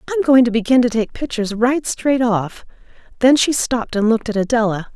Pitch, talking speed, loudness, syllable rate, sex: 240 Hz, 205 wpm, -17 LUFS, 5.8 syllables/s, female